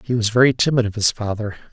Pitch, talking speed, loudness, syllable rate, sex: 115 Hz, 245 wpm, -18 LUFS, 6.7 syllables/s, male